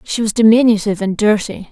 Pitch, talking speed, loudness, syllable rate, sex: 215 Hz, 175 wpm, -14 LUFS, 6.2 syllables/s, female